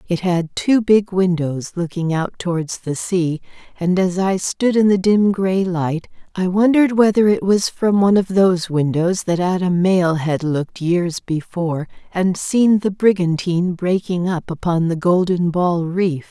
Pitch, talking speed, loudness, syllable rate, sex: 180 Hz, 175 wpm, -18 LUFS, 4.4 syllables/s, female